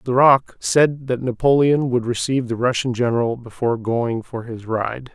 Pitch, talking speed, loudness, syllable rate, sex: 125 Hz, 165 wpm, -19 LUFS, 4.8 syllables/s, male